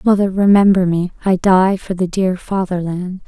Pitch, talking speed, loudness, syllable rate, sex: 185 Hz, 145 wpm, -15 LUFS, 4.7 syllables/s, female